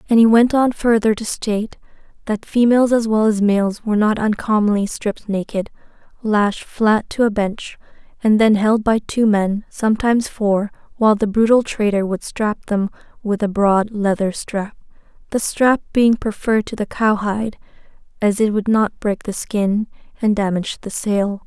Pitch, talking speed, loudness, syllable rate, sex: 215 Hz, 175 wpm, -18 LUFS, 4.7 syllables/s, female